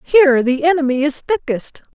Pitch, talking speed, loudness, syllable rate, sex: 290 Hz, 155 wpm, -16 LUFS, 5.1 syllables/s, female